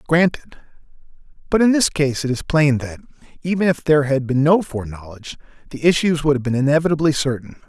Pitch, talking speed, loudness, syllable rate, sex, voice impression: 145 Hz, 180 wpm, -18 LUFS, 6.2 syllables/s, male, very masculine, very middle-aged, thick, tensed, very powerful, bright, soft, slightly muffled, fluent, raspy, cool, intellectual, slightly refreshing, sincere, calm, mature, friendly, reassuring, unique, slightly elegant, wild, sweet, very lively, kind, slightly modest